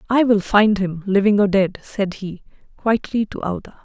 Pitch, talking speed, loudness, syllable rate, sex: 200 Hz, 190 wpm, -19 LUFS, 5.0 syllables/s, female